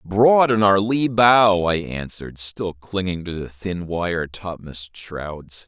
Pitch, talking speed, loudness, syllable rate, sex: 95 Hz, 160 wpm, -20 LUFS, 3.4 syllables/s, male